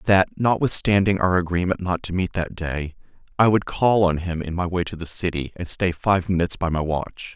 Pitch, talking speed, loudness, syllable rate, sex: 90 Hz, 220 wpm, -22 LUFS, 5.2 syllables/s, male